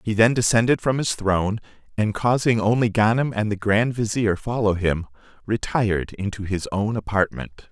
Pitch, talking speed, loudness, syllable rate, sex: 110 Hz, 165 wpm, -22 LUFS, 5.0 syllables/s, male